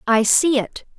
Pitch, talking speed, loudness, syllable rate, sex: 250 Hz, 185 wpm, -17 LUFS, 4.0 syllables/s, female